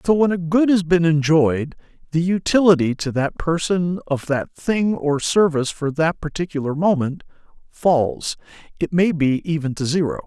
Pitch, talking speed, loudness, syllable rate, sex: 160 Hz, 165 wpm, -19 LUFS, 4.7 syllables/s, male